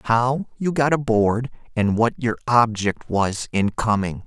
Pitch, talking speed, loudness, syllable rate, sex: 115 Hz, 155 wpm, -21 LUFS, 3.9 syllables/s, male